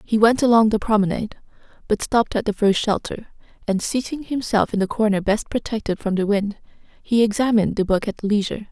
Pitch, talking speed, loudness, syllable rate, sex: 215 Hz, 195 wpm, -20 LUFS, 5.9 syllables/s, female